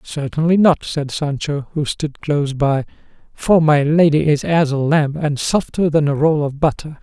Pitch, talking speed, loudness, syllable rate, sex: 150 Hz, 190 wpm, -17 LUFS, 4.5 syllables/s, male